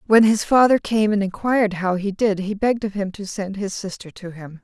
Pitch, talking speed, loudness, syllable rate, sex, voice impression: 205 Hz, 245 wpm, -20 LUFS, 5.4 syllables/s, female, feminine, adult-like, calm, slightly kind